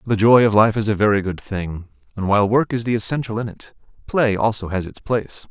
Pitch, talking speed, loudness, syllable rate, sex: 110 Hz, 250 wpm, -19 LUFS, 6.1 syllables/s, male